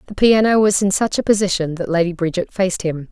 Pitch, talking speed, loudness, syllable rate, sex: 185 Hz, 230 wpm, -17 LUFS, 6.1 syllables/s, female